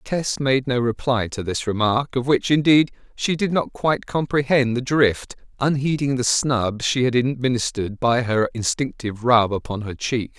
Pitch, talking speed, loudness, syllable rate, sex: 125 Hz, 175 wpm, -21 LUFS, 4.7 syllables/s, male